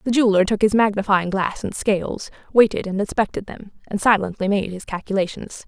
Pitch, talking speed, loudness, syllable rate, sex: 200 Hz, 180 wpm, -20 LUFS, 5.8 syllables/s, female